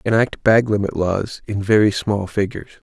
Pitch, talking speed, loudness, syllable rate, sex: 105 Hz, 165 wpm, -19 LUFS, 5.1 syllables/s, male